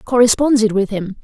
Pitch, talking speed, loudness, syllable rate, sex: 225 Hz, 145 wpm, -15 LUFS, 5.5 syllables/s, female